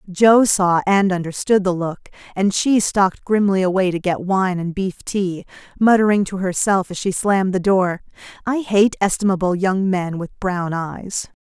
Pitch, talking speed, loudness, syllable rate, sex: 190 Hz, 175 wpm, -18 LUFS, 4.5 syllables/s, female